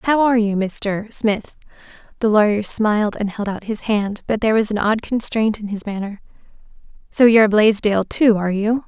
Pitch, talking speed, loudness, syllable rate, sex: 215 Hz, 190 wpm, -18 LUFS, 5.2 syllables/s, female